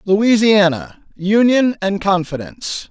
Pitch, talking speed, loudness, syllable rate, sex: 200 Hz, 60 wpm, -15 LUFS, 3.8 syllables/s, male